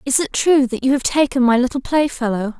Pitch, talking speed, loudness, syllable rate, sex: 260 Hz, 230 wpm, -17 LUFS, 5.7 syllables/s, female